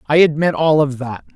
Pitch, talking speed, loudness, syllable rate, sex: 150 Hz, 220 wpm, -15 LUFS, 5.2 syllables/s, male